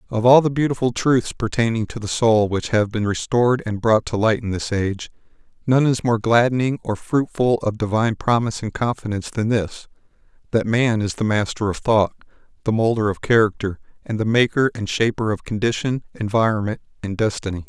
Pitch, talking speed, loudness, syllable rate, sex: 115 Hz, 180 wpm, -20 LUFS, 5.6 syllables/s, male